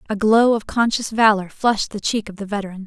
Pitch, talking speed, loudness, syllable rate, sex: 210 Hz, 230 wpm, -19 LUFS, 6.0 syllables/s, female